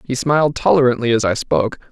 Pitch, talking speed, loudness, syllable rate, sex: 125 Hz, 190 wpm, -16 LUFS, 6.4 syllables/s, male